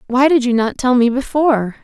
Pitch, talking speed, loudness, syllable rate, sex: 255 Hz, 230 wpm, -15 LUFS, 5.6 syllables/s, female